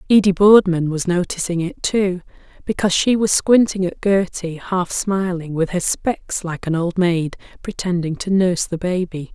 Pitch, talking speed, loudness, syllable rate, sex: 180 Hz, 165 wpm, -18 LUFS, 4.6 syllables/s, female